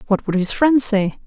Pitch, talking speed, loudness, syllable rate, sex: 215 Hz, 235 wpm, -17 LUFS, 4.8 syllables/s, female